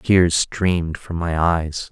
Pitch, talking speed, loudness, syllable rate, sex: 85 Hz, 155 wpm, -20 LUFS, 3.2 syllables/s, male